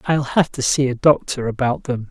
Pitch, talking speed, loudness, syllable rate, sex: 130 Hz, 230 wpm, -19 LUFS, 5.1 syllables/s, male